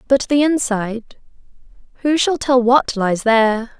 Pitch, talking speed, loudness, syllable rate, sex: 245 Hz, 140 wpm, -16 LUFS, 4.4 syllables/s, female